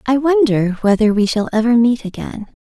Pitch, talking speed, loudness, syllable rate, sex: 230 Hz, 180 wpm, -15 LUFS, 5.0 syllables/s, female